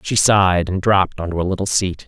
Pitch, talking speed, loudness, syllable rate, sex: 95 Hz, 230 wpm, -17 LUFS, 6.1 syllables/s, male